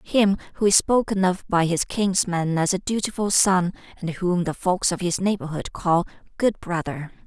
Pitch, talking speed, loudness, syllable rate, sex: 185 Hz, 180 wpm, -22 LUFS, 4.7 syllables/s, female